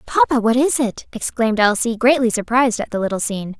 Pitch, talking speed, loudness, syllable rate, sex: 230 Hz, 200 wpm, -18 LUFS, 6.2 syllables/s, female